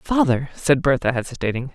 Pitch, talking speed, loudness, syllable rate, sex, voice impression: 140 Hz, 135 wpm, -20 LUFS, 5.4 syllables/s, female, feminine, adult-like, tensed, bright, soft, slightly nasal, intellectual, calm, friendly, reassuring, elegant, lively, slightly kind